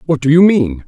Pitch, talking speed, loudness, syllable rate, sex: 145 Hz, 275 wpm, -11 LUFS, 5.5 syllables/s, male